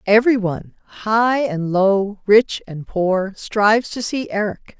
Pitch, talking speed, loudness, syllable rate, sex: 210 Hz, 150 wpm, -18 LUFS, 4.2 syllables/s, female